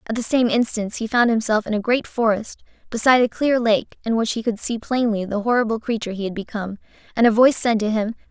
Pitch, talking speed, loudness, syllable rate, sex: 225 Hz, 240 wpm, -20 LUFS, 6.2 syllables/s, female